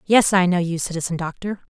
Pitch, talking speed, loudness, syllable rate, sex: 180 Hz, 210 wpm, -20 LUFS, 5.7 syllables/s, female